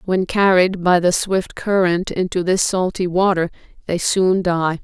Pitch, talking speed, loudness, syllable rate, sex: 180 Hz, 160 wpm, -18 LUFS, 4.2 syllables/s, female